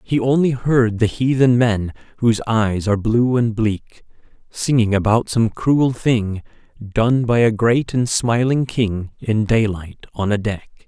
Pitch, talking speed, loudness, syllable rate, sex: 115 Hz, 160 wpm, -18 LUFS, 4.0 syllables/s, male